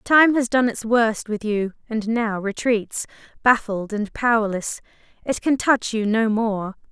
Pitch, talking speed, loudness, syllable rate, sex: 225 Hz, 165 wpm, -21 LUFS, 4.0 syllables/s, female